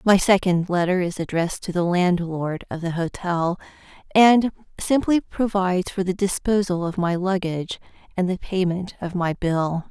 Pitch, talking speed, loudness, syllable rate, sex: 185 Hz, 155 wpm, -22 LUFS, 4.7 syllables/s, female